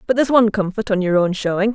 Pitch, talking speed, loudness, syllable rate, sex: 210 Hz, 275 wpm, -17 LUFS, 7.5 syllables/s, female